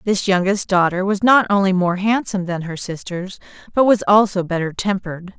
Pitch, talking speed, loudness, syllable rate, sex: 190 Hz, 180 wpm, -18 LUFS, 5.3 syllables/s, female